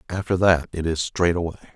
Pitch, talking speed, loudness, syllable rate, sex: 85 Hz, 205 wpm, -22 LUFS, 6.0 syllables/s, male